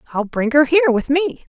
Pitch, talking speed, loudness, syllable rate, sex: 280 Hz, 230 wpm, -17 LUFS, 6.6 syllables/s, female